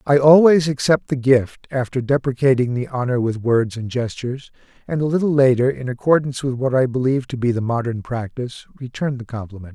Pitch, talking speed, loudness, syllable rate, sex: 130 Hz, 190 wpm, -19 LUFS, 5.8 syllables/s, male